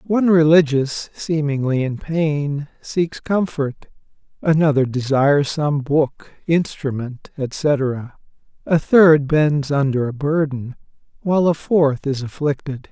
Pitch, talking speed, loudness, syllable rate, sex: 145 Hz, 110 wpm, -18 LUFS, 3.7 syllables/s, male